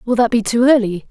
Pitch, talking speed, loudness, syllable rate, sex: 230 Hz, 270 wpm, -15 LUFS, 6.1 syllables/s, female